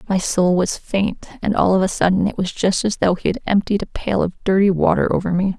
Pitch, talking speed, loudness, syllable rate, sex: 190 Hz, 260 wpm, -19 LUFS, 5.5 syllables/s, female